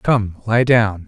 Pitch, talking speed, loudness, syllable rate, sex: 105 Hz, 170 wpm, -16 LUFS, 3.3 syllables/s, male